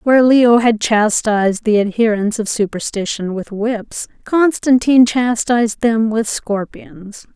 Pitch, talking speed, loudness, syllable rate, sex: 225 Hz, 120 wpm, -15 LUFS, 4.1 syllables/s, female